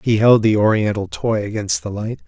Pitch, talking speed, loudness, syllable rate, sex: 105 Hz, 210 wpm, -17 LUFS, 5.2 syllables/s, male